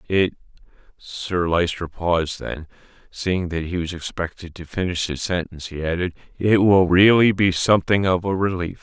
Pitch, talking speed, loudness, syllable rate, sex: 90 Hz, 165 wpm, -21 LUFS, 5.0 syllables/s, male